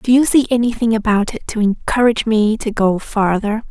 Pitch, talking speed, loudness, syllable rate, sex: 220 Hz, 195 wpm, -16 LUFS, 5.3 syllables/s, female